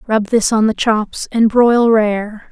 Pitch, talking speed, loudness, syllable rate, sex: 220 Hz, 190 wpm, -14 LUFS, 3.4 syllables/s, female